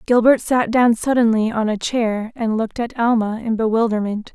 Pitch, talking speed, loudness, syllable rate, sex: 225 Hz, 180 wpm, -18 LUFS, 5.0 syllables/s, female